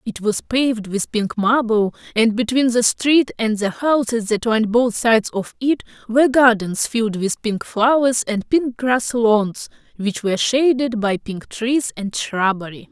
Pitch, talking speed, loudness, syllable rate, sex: 230 Hz, 170 wpm, -18 LUFS, 4.3 syllables/s, female